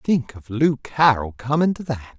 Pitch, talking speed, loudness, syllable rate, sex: 130 Hz, 190 wpm, -21 LUFS, 4.7 syllables/s, male